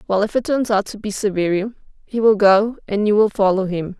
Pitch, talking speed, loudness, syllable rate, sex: 205 Hz, 240 wpm, -18 LUFS, 5.6 syllables/s, female